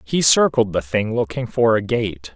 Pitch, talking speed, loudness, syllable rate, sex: 110 Hz, 205 wpm, -18 LUFS, 4.4 syllables/s, male